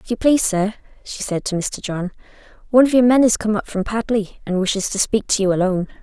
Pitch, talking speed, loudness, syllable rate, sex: 210 Hz, 250 wpm, -19 LUFS, 6.4 syllables/s, female